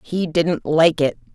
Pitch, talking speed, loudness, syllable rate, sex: 155 Hz, 180 wpm, -18 LUFS, 3.6 syllables/s, female